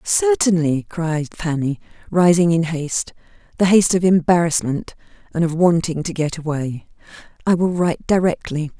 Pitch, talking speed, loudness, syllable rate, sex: 165 Hz, 130 wpm, -18 LUFS, 4.9 syllables/s, female